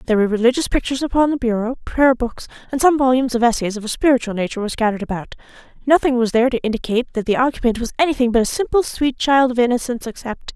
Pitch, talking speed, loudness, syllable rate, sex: 245 Hz, 215 wpm, -18 LUFS, 7.6 syllables/s, female